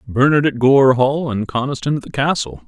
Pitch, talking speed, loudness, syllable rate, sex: 135 Hz, 200 wpm, -16 LUFS, 5.2 syllables/s, male